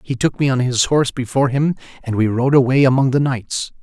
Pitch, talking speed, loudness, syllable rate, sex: 130 Hz, 235 wpm, -17 LUFS, 5.9 syllables/s, male